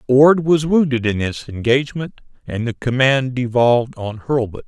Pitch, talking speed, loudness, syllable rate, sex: 130 Hz, 155 wpm, -17 LUFS, 4.7 syllables/s, male